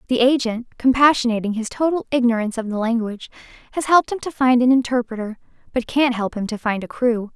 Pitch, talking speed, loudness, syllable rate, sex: 240 Hz, 195 wpm, -20 LUFS, 4.0 syllables/s, female